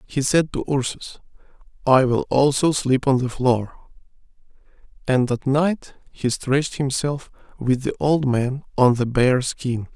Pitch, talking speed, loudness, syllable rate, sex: 130 Hz, 150 wpm, -21 LUFS, 4.1 syllables/s, male